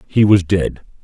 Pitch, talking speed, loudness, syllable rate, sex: 95 Hz, 175 wpm, -15 LUFS, 4.2 syllables/s, male